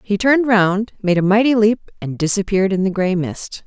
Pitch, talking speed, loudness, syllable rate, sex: 200 Hz, 215 wpm, -17 LUFS, 5.6 syllables/s, female